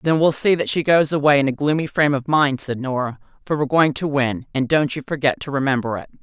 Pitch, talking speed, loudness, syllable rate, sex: 140 Hz, 260 wpm, -19 LUFS, 6.2 syllables/s, female